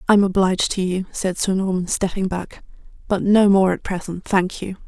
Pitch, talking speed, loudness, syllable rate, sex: 190 Hz, 195 wpm, -20 LUFS, 5.1 syllables/s, female